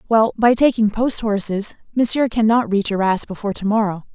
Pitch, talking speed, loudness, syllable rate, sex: 215 Hz, 175 wpm, -18 LUFS, 5.5 syllables/s, female